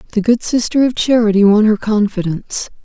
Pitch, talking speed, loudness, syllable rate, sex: 220 Hz, 170 wpm, -14 LUFS, 5.8 syllables/s, female